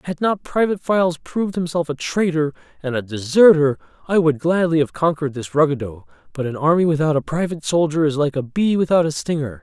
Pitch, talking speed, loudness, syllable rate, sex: 155 Hz, 200 wpm, -19 LUFS, 6.1 syllables/s, male